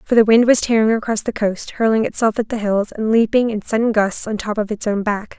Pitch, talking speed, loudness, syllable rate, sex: 220 Hz, 265 wpm, -17 LUFS, 5.7 syllables/s, female